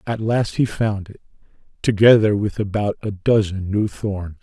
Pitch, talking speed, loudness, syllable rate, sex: 105 Hz, 165 wpm, -19 LUFS, 4.5 syllables/s, male